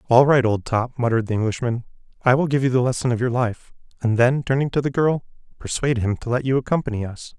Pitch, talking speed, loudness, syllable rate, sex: 125 Hz, 235 wpm, -21 LUFS, 6.5 syllables/s, male